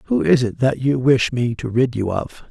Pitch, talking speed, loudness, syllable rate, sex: 125 Hz, 265 wpm, -19 LUFS, 4.9 syllables/s, male